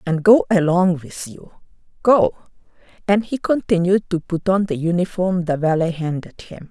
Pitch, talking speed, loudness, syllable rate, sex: 180 Hz, 160 wpm, -18 LUFS, 4.7 syllables/s, female